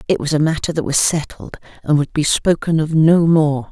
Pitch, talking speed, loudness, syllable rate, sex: 155 Hz, 225 wpm, -16 LUFS, 5.2 syllables/s, female